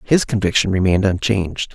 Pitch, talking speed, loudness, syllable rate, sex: 100 Hz, 135 wpm, -17 LUFS, 6.1 syllables/s, male